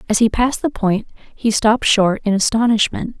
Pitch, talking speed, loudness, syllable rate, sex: 220 Hz, 190 wpm, -16 LUFS, 5.3 syllables/s, female